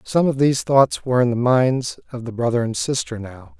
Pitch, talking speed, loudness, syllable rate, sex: 125 Hz, 235 wpm, -19 LUFS, 5.4 syllables/s, male